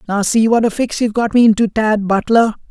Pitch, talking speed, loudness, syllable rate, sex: 220 Hz, 245 wpm, -14 LUFS, 5.8 syllables/s, male